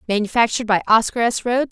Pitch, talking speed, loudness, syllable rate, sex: 230 Hz, 175 wpm, -18 LUFS, 6.9 syllables/s, female